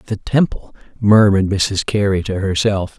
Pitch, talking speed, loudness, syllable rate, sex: 100 Hz, 140 wpm, -16 LUFS, 4.7 syllables/s, male